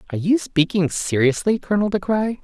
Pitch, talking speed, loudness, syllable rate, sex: 190 Hz, 175 wpm, -20 LUFS, 5.8 syllables/s, female